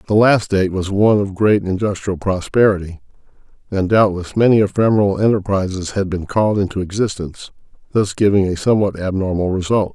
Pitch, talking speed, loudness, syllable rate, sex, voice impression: 100 Hz, 150 wpm, -17 LUFS, 5.8 syllables/s, male, very masculine, slightly old, very thick, slightly relaxed, very powerful, dark, slightly hard, clear, fluent, cool, intellectual, slightly refreshing, sincere, very calm, very mature, friendly, very reassuring, unique, slightly elegant, wild, slightly sweet, lively, kind